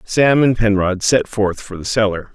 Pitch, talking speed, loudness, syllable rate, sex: 105 Hz, 205 wpm, -16 LUFS, 4.4 syllables/s, male